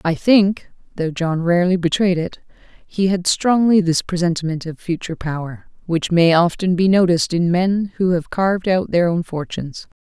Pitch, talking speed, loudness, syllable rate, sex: 175 Hz, 160 wpm, -18 LUFS, 5.0 syllables/s, female